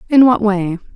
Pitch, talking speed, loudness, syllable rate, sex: 215 Hz, 190 wpm, -14 LUFS, 4.8 syllables/s, female